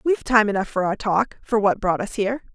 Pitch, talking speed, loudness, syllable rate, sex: 215 Hz, 260 wpm, -21 LUFS, 6.0 syllables/s, female